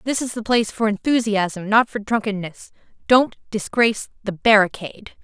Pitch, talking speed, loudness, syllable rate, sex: 215 Hz, 150 wpm, -19 LUFS, 5.1 syllables/s, female